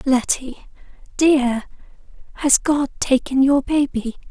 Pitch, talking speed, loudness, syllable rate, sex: 270 Hz, 100 wpm, -18 LUFS, 3.7 syllables/s, female